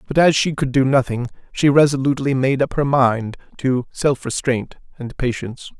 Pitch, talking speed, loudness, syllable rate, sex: 130 Hz, 175 wpm, -18 LUFS, 5.1 syllables/s, male